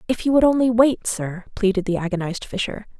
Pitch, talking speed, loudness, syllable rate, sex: 215 Hz, 200 wpm, -20 LUFS, 6.1 syllables/s, female